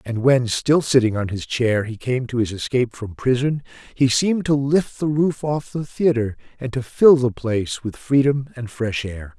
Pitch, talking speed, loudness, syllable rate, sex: 125 Hz, 210 wpm, -20 LUFS, 4.7 syllables/s, male